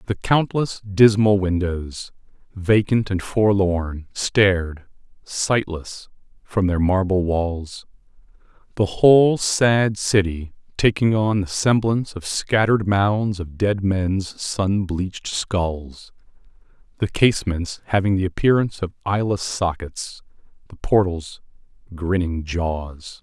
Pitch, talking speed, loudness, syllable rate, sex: 95 Hz, 105 wpm, -20 LUFS, 3.6 syllables/s, male